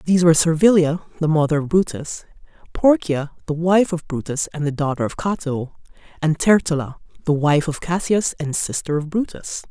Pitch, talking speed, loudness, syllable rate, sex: 160 Hz, 165 wpm, -20 LUFS, 5.3 syllables/s, female